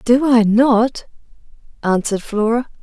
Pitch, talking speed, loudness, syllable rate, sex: 230 Hz, 105 wpm, -16 LUFS, 4.3 syllables/s, female